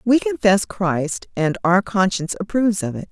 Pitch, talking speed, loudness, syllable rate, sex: 195 Hz, 175 wpm, -19 LUFS, 4.9 syllables/s, female